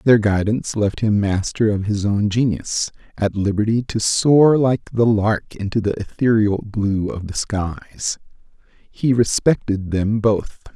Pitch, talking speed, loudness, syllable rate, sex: 105 Hz, 150 wpm, -19 LUFS, 4.0 syllables/s, male